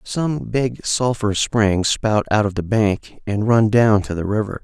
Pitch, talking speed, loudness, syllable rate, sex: 110 Hz, 195 wpm, -19 LUFS, 3.8 syllables/s, male